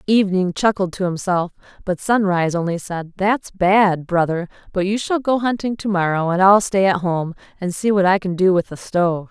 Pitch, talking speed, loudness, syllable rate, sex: 190 Hz, 205 wpm, -19 LUFS, 5.2 syllables/s, female